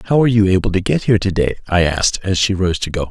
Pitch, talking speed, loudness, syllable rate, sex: 100 Hz, 310 wpm, -16 LUFS, 7.2 syllables/s, male